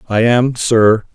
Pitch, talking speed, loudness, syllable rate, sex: 115 Hz, 160 wpm, -13 LUFS, 3.5 syllables/s, male